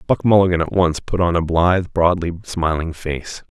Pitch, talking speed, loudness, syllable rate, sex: 85 Hz, 185 wpm, -18 LUFS, 5.1 syllables/s, male